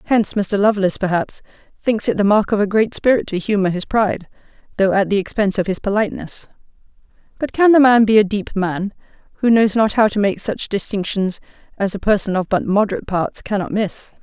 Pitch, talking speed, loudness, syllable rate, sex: 205 Hz, 200 wpm, -17 LUFS, 6.0 syllables/s, female